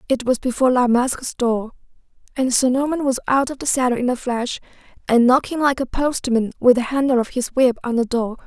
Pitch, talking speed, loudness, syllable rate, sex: 250 Hz, 220 wpm, -19 LUFS, 5.6 syllables/s, female